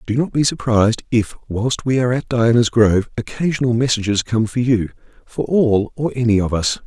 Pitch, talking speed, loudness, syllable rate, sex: 120 Hz, 185 wpm, -18 LUFS, 5.4 syllables/s, male